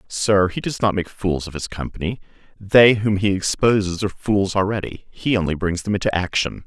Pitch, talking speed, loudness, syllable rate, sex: 100 Hz, 200 wpm, -20 LUFS, 5.3 syllables/s, male